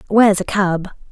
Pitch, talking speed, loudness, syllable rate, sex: 195 Hz, 160 wpm, -16 LUFS, 5.1 syllables/s, female